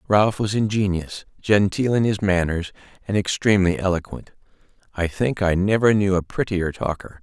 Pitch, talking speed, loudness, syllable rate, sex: 100 Hz, 150 wpm, -21 LUFS, 5.0 syllables/s, male